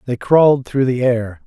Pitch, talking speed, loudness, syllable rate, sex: 125 Hz, 205 wpm, -15 LUFS, 4.7 syllables/s, male